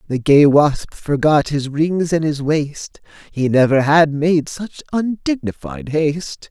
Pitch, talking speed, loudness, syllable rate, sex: 150 Hz, 145 wpm, -16 LUFS, 3.7 syllables/s, male